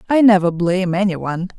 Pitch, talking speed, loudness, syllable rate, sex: 190 Hz, 150 wpm, -16 LUFS, 6.1 syllables/s, female